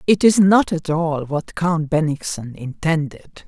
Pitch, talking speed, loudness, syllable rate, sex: 160 Hz, 155 wpm, -19 LUFS, 3.9 syllables/s, female